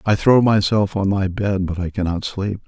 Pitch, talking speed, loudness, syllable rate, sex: 100 Hz, 225 wpm, -19 LUFS, 4.8 syllables/s, male